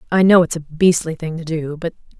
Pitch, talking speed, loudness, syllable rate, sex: 165 Hz, 245 wpm, -17 LUFS, 5.9 syllables/s, female